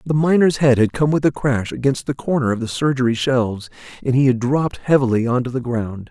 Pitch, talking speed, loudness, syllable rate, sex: 130 Hz, 235 wpm, -18 LUFS, 5.9 syllables/s, male